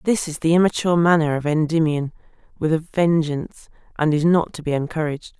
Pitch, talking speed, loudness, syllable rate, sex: 160 Hz, 180 wpm, -20 LUFS, 6.0 syllables/s, female